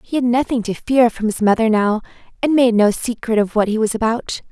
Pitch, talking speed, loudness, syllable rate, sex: 230 Hz, 240 wpm, -17 LUFS, 5.6 syllables/s, female